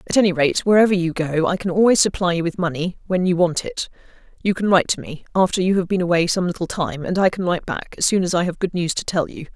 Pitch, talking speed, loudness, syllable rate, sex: 180 Hz, 285 wpm, -20 LUFS, 6.6 syllables/s, female